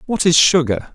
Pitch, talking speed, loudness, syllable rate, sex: 160 Hz, 190 wpm, -14 LUFS, 4.9 syllables/s, male